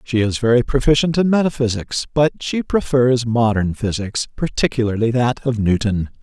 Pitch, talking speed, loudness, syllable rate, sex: 120 Hz, 145 wpm, -18 LUFS, 5.0 syllables/s, male